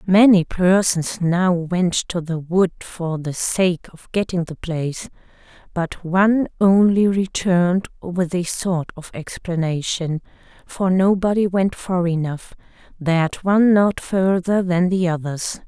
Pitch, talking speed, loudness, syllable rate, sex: 180 Hz, 135 wpm, -19 LUFS, 3.9 syllables/s, female